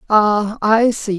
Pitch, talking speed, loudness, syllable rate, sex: 215 Hz, 150 wpm, -15 LUFS, 3.0 syllables/s, female